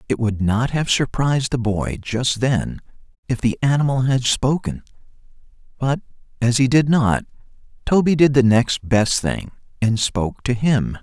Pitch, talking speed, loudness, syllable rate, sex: 120 Hz, 160 wpm, -19 LUFS, 4.5 syllables/s, male